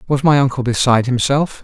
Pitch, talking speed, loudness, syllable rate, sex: 135 Hz, 185 wpm, -15 LUFS, 6.1 syllables/s, male